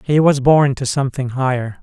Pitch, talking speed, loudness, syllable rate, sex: 135 Hz, 200 wpm, -16 LUFS, 5.3 syllables/s, male